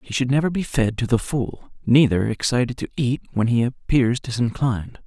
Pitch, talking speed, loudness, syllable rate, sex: 125 Hz, 190 wpm, -21 LUFS, 5.3 syllables/s, male